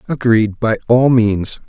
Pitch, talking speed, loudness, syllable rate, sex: 115 Hz, 145 wpm, -14 LUFS, 3.7 syllables/s, male